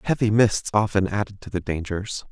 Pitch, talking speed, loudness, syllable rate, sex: 100 Hz, 180 wpm, -23 LUFS, 5.2 syllables/s, male